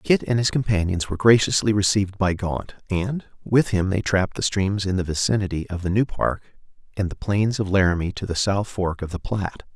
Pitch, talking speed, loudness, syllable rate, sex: 100 Hz, 215 wpm, -22 LUFS, 5.5 syllables/s, male